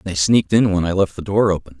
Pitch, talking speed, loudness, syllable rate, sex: 90 Hz, 300 wpm, -17 LUFS, 6.6 syllables/s, male